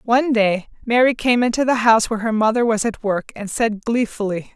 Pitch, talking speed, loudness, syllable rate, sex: 225 Hz, 210 wpm, -18 LUFS, 5.6 syllables/s, female